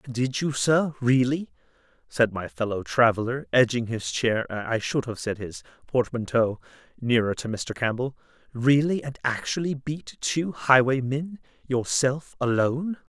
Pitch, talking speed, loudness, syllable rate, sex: 130 Hz, 135 wpm, -25 LUFS, 4.5 syllables/s, male